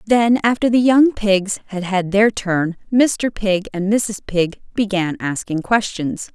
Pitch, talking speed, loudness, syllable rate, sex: 205 Hz, 160 wpm, -18 LUFS, 3.8 syllables/s, female